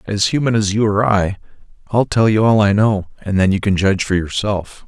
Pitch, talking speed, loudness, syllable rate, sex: 100 Hz, 235 wpm, -16 LUFS, 5.3 syllables/s, male